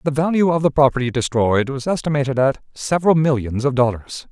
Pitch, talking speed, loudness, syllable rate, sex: 140 Hz, 180 wpm, -18 LUFS, 5.9 syllables/s, male